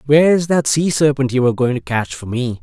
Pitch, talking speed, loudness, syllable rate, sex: 140 Hz, 250 wpm, -16 LUFS, 5.7 syllables/s, male